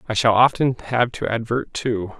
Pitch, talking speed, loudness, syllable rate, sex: 115 Hz, 190 wpm, -20 LUFS, 4.7 syllables/s, male